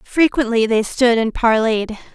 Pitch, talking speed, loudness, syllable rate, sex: 235 Hz, 140 wpm, -16 LUFS, 4.2 syllables/s, female